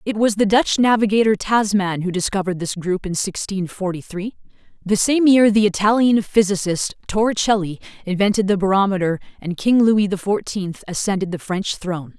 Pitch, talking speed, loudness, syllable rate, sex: 200 Hz, 165 wpm, -19 LUFS, 5.3 syllables/s, female